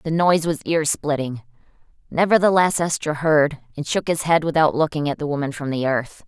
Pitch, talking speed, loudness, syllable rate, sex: 150 Hz, 190 wpm, -20 LUFS, 5.3 syllables/s, female